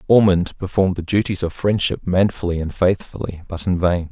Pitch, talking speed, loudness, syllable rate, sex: 90 Hz, 175 wpm, -20 LUFS, 5.4 syllables/s, male